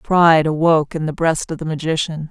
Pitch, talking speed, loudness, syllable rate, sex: 160 Hz, 210 wpm, -17 LUFS, 5.7 syllables/s, female